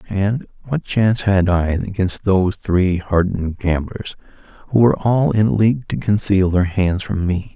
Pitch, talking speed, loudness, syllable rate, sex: 95 Hz, 165 wpm, -18 LUFS, 4.6 syllables/s, male